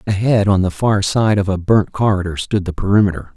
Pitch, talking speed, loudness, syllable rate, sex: 100 Hz, 215 wpm, -16 LUFS, 5.6 syllables/s, male